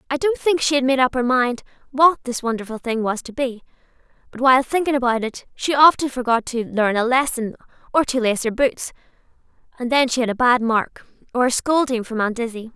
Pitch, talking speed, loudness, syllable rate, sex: 250 Hz, 215 wpm, -19 LUFS, 5.6 syllables/s, female